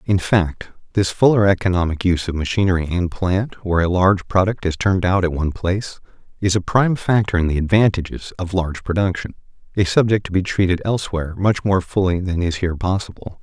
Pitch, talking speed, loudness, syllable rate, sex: 90 Hz, 190 wpm, -19 LUFS, 6.1 syllables/s, male